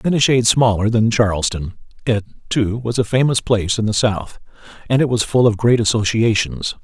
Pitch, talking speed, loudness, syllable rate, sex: 110 Hz, 195 wpm, -17 LUFS, 5.4 syllables/s, male